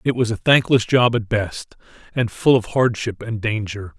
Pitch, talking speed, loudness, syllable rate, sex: 115 Hz, 195 wpm, -19 LUFS, 4.6 syllables/s, male